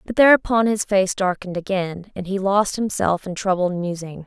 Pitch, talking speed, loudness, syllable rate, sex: 190 Hz, 185 wpm, -20 LUFS, 5.1 syllables/s, female